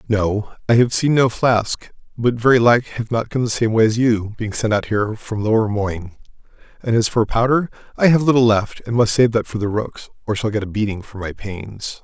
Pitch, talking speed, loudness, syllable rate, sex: 110 Hz, 230 wpm, -18 LUFS, 5.2 syllables/s, male